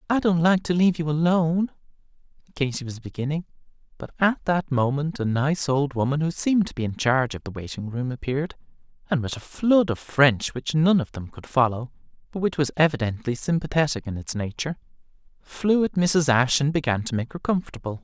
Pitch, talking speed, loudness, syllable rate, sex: 145 Hz, 195 wpm, -24 LUFS, 5.8 syllables/s, male